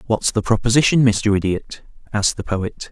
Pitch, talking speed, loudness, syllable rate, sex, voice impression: 110 Hz, 165 wpm, -18 LUFS, 5.2 syllables/s, male, masculine, slightly gender-neutral, adult-like, slightly middle-aged, slightly thick, slightly relaxed, slightly weak, slightly dark, slightly hard, slightly muffled, slightly fluent, cool, refreshing, very sincere, calm, friendly, reassuring, very elegant, sweet, lively, very kind, slightly modest